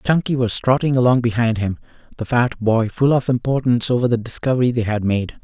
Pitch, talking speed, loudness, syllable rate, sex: 120 Hz, 200 wpm, -18 LUFS, 6.0 syllables/s, male